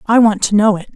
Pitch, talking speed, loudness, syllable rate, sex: 210 Hz, 315 wpm, -13 LUFS, 6.1 syllables/s, female